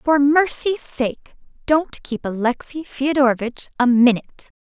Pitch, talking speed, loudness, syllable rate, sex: 270 Hz, 115 wpm, -19 LUFS, 4.3 syllables/s, female